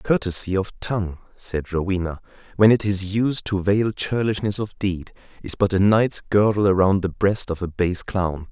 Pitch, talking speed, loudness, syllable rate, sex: 100 Hz, 185 wpm, -21 LUFS, 4.6 syllables/s, male